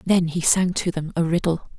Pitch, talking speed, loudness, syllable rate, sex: 170 Hz, 235 wpm, -21 LUFS, 5.0 syllables/s, female